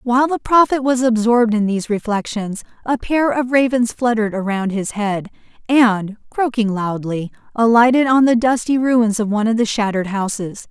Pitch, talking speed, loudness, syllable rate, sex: 230 Hz, 170 wpm, -17 LUFS, 5.2 syllables/s, female